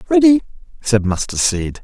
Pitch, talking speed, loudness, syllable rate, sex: 160 Hz, 100 wpm, -16 LUFS, 4.7 syllables/s, male